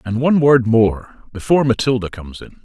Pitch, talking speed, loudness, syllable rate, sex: 120 Hz, 180 wpm, -15 LUFS, 6.1 syllables/s, male